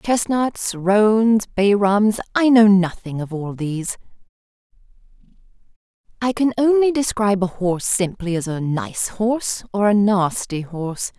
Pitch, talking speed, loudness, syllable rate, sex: 200 Hz, 130 wpm, -19 LUFS, 4.2 syllables/s, female